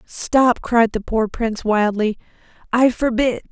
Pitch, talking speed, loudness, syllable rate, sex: 230 Hz, 135 wpm, -18 LUFS, 4.0 syllables/s, female